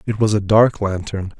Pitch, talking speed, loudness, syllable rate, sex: 105 Hz, 215 wpm, -17 LUFS, 4.9 syllables/s, male